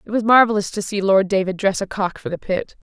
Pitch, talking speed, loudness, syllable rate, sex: 200 Hz, 265 wpm, -19 LUFS, 6.0 syllables/s, female